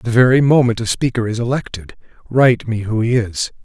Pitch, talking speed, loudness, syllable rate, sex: 120 Hz, 200 wpm, -16 LUFS, 5.7 syllables/s, male